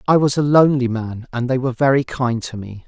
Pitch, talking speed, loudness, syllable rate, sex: 130 Hz, 250 wpm, -18 LUFS, 6.0 syllables/s, male